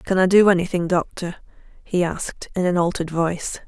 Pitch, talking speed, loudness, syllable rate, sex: 180 Hz, 180 wpm, -20 LUFS, 5.8 syllables/s, female